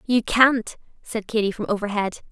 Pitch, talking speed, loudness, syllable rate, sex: 220 Hz, 155 wpm, -22 LUFS, 4.9 syllables/s, female